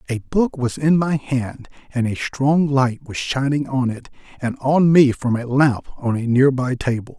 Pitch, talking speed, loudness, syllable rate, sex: 130 Hz, 210 wpm, -19 LUFS, 4.3 syllables/s, male